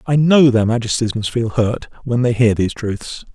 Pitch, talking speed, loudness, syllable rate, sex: 120 Hz, 215 wpm, -16 LUFS, 5.1 syllables/s, male